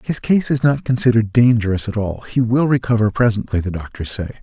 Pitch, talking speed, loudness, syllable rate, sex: 115 Hz, 205 wpm, -17 LUFS, 5.9 syllables/s, male